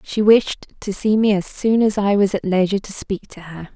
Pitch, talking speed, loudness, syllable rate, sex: 200 Hz, 255 wpm, -18 LUFS, 5.1 syllables/s, female